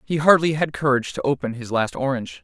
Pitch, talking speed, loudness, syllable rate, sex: 140 Hz, 220 wpm, -21 LUFS, 6.6 syllables/s, male